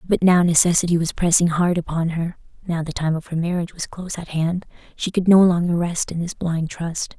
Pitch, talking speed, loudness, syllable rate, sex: 170 Hz, 210 wpm, -20 LUFS, 5.5 syllables/s, female